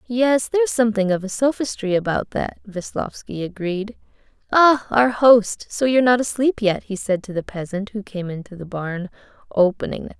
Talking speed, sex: 190 wpm, female